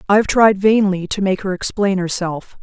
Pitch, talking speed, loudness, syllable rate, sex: 195 Hz, 205 wpm, -16 LUFS, 4.9 syllables/s, female